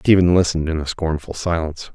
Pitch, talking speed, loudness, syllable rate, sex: 80 Hz, 155 wpm, -19 LUFS, 5.8 syllables/s, male